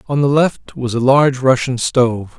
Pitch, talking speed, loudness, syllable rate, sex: 130 Hz, 200 wpm, -15 LUFS, 4.9 syllables/s, male